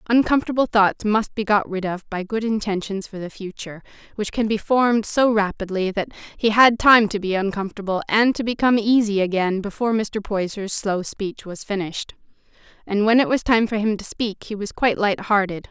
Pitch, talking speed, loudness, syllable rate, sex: 210 Hz, 195 wpm, -21 LUFS, 5.5 syllables/s, female